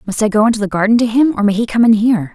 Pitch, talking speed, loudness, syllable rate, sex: 220 Hz, 360 wpm, -13 LUFS, 7.8 syllables/s, female